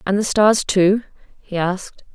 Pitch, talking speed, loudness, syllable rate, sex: 195 Hz, 170 wpm, -18 LUFS, 4.5 syllables/s, female